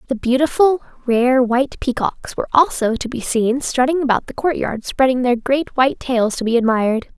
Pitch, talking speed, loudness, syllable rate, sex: 255 Hz, 185 wpm, -17 LUFS, 5.3 syllables/s, female